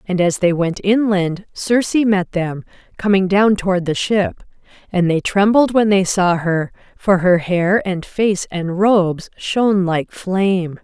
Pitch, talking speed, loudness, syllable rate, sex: 190 Hz, 165 wpm, -17 LUFS, 4.0 syllables/s, female